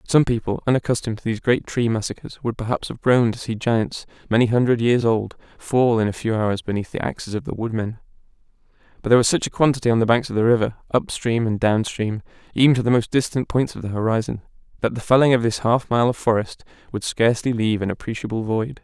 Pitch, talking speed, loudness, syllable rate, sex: 115 Hz, 225 wpm, -21 LUFS, 6.3 syllables/s, male